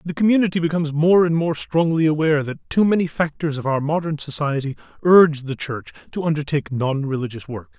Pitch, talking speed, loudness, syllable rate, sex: 155 Hz, 185 wpm, -20 LUFS, 6.0 syllables/s, male